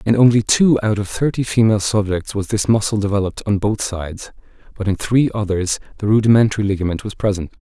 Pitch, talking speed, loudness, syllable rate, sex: 105 Hz, 190 wpm, -17 LUFS, 6.3 syllables/s, male